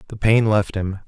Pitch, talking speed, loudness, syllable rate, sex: 105 Hz, 225 wpm, -19 LUFS, 4.9 syllables/s, male